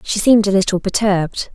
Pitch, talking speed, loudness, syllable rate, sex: 195 Hz, 195 wpm, -16 LUFS, 6.3 syllables/s, female